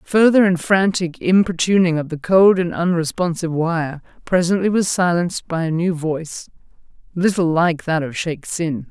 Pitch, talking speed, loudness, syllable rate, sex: 170 Hz, 155 wpm, -18 LUFS, 4.8 syllables/s, female